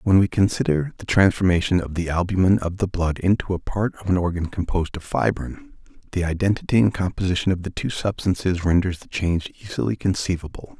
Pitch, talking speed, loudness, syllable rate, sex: 95 Hz, 185 wpm, -22 LUFS, 6.0 syllables/s, male